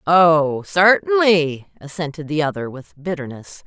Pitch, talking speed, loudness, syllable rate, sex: 160 Hz, 115 wpm, -18 LUFS, 4.1 syllables/s, female